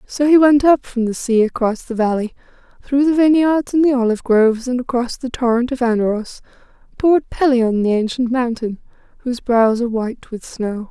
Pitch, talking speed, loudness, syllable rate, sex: 245 Hz, 185 wpm, -17 LUFS, 5.5 syllables/s, female